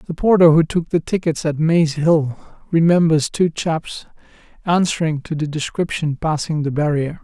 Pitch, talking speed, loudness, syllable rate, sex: 160 Hz, 160 wpm, -18 LUFS, 4.5 syllables/s, male